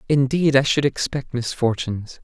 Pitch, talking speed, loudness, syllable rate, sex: 130 Hz, 135 wpm, -20 LUFS, 4.9 syllables/s, male